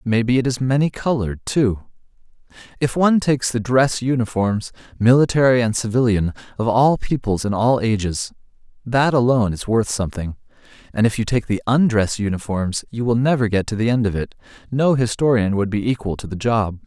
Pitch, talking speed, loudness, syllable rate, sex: 115 Hz, 180 wpm, -19 LUFS, 5.5 syllables/s, male